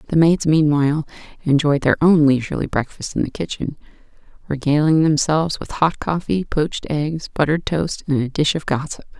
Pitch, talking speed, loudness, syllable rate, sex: 150 Hz, 165 wpm, -19 LUFS, 5.5 syllables/s, female